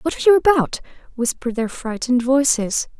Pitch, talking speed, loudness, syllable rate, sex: 265 Hz, 160 wpm, -18 LUFS, 6.1 syllables/s, female